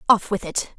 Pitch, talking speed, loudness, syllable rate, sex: 200 Hz, 230 wpm, -22 LUFS, 4.9 syllables/s, female